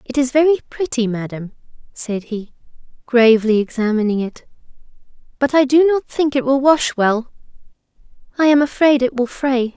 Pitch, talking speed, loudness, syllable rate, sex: 250 Hz, 155 wpm, -17 LUFS, 5.1 syllables/s, female